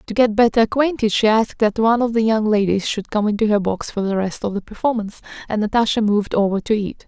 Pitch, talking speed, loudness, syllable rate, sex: 215 Hz, 245 wpm, -18 LUFS, 6.5 syllables/s, female